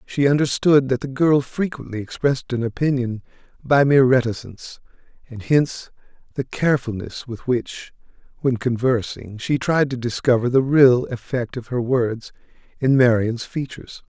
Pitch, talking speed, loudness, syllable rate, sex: 125 Hz, 140 wpm, -20 LUFS, 4.9 syllables/s, male